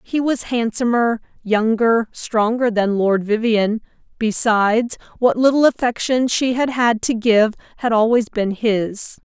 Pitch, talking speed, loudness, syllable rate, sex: 230 Hz, 135 wpm, -18 LUFS, 4.1 syllables/s, female